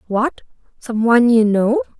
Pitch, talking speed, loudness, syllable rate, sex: 240 Hz, 120 wpm, -16 LUFS, 4.6 syllables/s, female